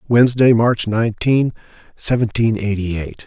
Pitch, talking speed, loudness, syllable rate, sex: 110 Hz, 110 wpm, -17 LUFS, 5.0 syllables/s, male